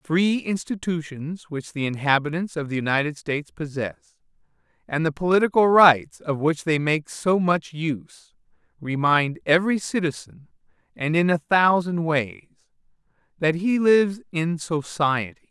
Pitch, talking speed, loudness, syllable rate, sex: 160 Hz, 135 wpm, -22 LUFS, 4.5 syllables/s, male